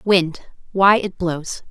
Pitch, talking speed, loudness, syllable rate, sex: 180 Hz, 105 wpm, -18 LUFS, 3.1 syllables/s, female